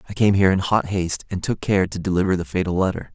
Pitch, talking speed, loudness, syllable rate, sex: 95 Hz, 265 wpm, -21 LUFS, 6.9 syllables/s, male